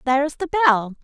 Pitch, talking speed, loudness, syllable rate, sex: 280 Hz, 175 wpm, -19 LUFS, 6.1 syllables/s, female